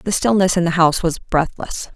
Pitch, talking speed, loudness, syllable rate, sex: 175 Hz, 215 wpm, -18 LUFS, 5.3 syllables/s, female